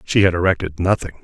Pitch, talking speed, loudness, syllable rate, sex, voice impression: 90 Hz, 195 wpm, -18 LUFS, 6.7 syllables/s, male, masculine, very adult-like, middle-aged, very thick, slightly tensed, powerful, bright, slightly hard, muffled, very fluent, cool, very intellectual, slightly refreshing, very sincere, very calm, very mature, very friendly, very reassuring, unique, elegant, slightly sweet, lively, very kind